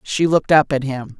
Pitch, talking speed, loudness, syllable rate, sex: 145 Hz, 250 wpm, -17 LUFS, 5.5 syllables/s, female